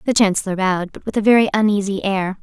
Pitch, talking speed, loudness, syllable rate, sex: 200 Hz, 220 wpm, -18 LUFS, 6.8 syllables/s, female